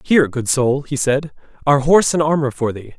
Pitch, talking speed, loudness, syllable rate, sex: 140 Hz, 220 wpm, -17 LUFS, 6.0 syllables/s, male